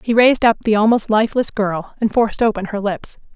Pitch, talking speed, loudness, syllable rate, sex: 215 Hz, 215 wpm, -17 LUFS, 6.1 syllables/s, female